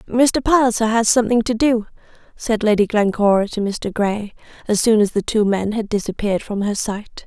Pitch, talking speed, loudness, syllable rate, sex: 215 Hz, 190 wpm, -18 LUFS, 5.3 syllables/s, female